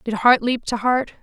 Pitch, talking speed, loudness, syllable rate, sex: 235 Hz, 245 wpm, -19 LUFS, 4.7 syllables/s, female